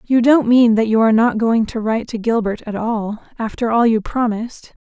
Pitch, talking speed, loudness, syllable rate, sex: 225 Hz, 210 wpm, -16 LUFS, 5.4 syllables/s, female